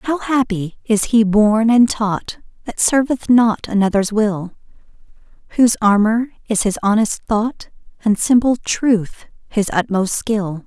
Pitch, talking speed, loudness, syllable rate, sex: 215 Hz, 135 wpm, -16 LUFS, 3.9 syllables/s, female